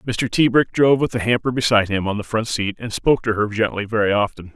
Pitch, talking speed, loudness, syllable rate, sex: 110 Hz, 250 wpm, -19 LUFS, 6.3 syllables/s, male